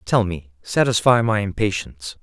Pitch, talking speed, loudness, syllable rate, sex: 100 Hz, 135 wpm, -20 LUFS, 4.9 syllables/s, male